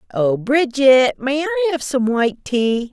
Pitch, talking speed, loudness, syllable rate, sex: 265 Hz, 165 wpm, -17 LUFS, 4.2 syllables/s, female